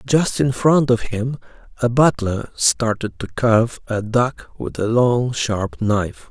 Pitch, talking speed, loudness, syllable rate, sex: 120 Hz, 160 wpm, -19 LUFS, 3.8 syllables/s, male